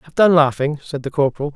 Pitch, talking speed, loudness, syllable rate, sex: 145 Hz, 230 wpm, -17 LUFS, 6.6 syllables/s, male